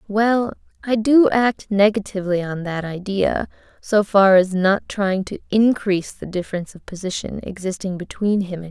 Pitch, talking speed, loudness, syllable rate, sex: 200 Hz, 165 wpm, -20 LUFS, 5.0 syllables/s, female